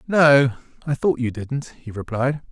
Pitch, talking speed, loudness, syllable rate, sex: 130 Hz, 165 wpm, -20 LUFS, 4.0 syllables/s, male